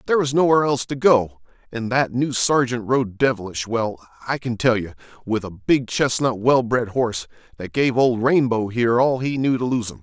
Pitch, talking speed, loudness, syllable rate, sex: 120 Hz, 210 wpm, -20 LUFS, 5.3 syllables/s, male